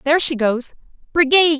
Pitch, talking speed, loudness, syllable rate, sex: 290 Hz, 150 wpm, -16 LUFS, 6.4 syllables/s, female